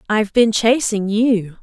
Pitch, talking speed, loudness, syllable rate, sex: 220 Hz, 145 wpm, -16 LUFS, 4.3 syllables/s, female